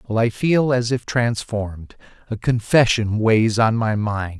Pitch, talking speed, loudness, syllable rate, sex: 115 Hz, 150 wpm, -19 LUFS, 4.1 syllables/s, male